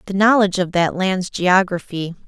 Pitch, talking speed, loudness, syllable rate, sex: 185 Hz, 160 wpm, -18 LUFS, 5.0 syllables/s, female